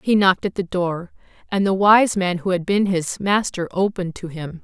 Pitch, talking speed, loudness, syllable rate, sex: 185 Hz, 220 wpm, -20 LUFS, 5.1 syllables/s, female